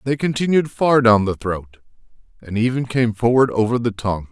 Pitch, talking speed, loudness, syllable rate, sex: 120 Hz, 180 wpm, -18 LUFS, 5.3 syllables/s, male